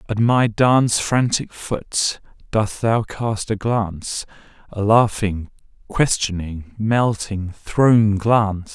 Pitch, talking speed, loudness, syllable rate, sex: 105 Hz, 110 wpm, -19 LUFS, 3.3 syllables/s, male